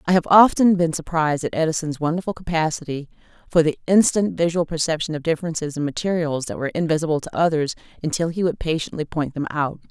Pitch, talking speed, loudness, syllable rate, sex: 160 Hz, 180 wpm, -21 LUFS, 6.5 syllables/s, female